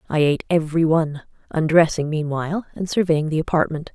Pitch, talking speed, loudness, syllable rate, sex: 160 Hz, 150 wpm, -20 LUFS, 6.2 syllables/s, female